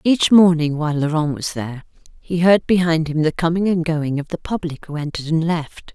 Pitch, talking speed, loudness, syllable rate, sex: 160 Hz, 210 wpm, -18 LUFS, 5.5 syllables/s, female